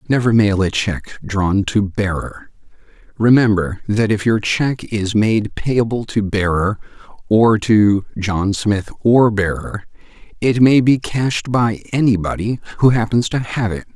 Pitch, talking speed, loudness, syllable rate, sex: 110 Hz, 145 wpm, -16 LUFS, 4.0 syllables/s, male